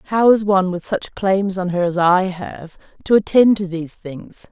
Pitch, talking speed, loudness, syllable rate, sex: 185 Hz, 215 wpm, -17 LUFS, 4.7 syllables/s, female